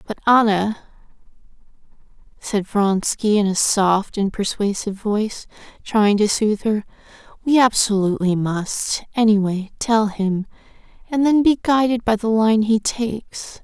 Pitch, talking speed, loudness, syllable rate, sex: 215 Hz, 130 wpm, -19 LUFS, 4.3 syllables/s, female